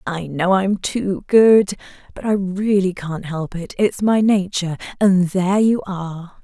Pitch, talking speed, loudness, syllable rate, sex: 190 Hz, 160 wpm, -18 LUFS, 4.1 syllables/s, female